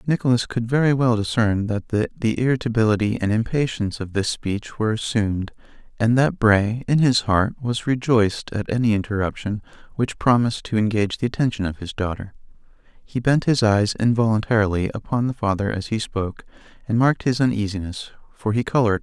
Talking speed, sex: 185 wpm, male